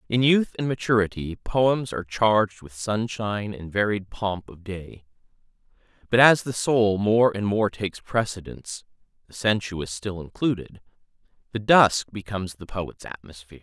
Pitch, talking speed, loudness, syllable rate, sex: 105 Hz, 145 wpm, -23 LUFS, 4.4 syllables/s, male